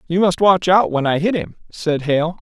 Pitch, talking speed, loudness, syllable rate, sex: 170 Hz, 245 wpm, -17 LUFS, 4.7 syllables/s, male